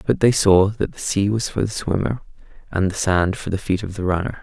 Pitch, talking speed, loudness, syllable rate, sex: 100 Hz, 255 wpm, -20 LUFS, 5.6 syllables/s, male